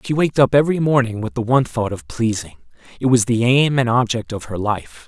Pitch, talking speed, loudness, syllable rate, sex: 120 Hz, 235 wpm, -18 LUFS, 5.9 syllables/s, male